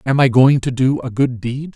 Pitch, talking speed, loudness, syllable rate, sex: 130 Hz, 275 wpm, -16 LUFS, 4.9 syllables/s, male